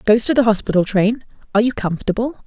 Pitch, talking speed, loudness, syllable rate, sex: 220 Hz, 170 wpm, -18 LUFS, 7.5 syllables/s, female